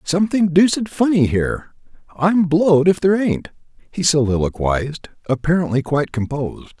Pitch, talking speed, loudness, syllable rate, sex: 160 Hz, 125 wpm, -18 LUFS, 5.4 syllables/s, male